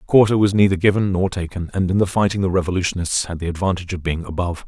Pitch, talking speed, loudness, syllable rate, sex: 90 Hz, 230 wpm, -19 LUFS, 7.1 syllables/s, male